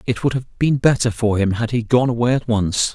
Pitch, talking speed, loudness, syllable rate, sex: 120 Hz, 265 wpm, -18 LUFS, 5.5 syllables/s, male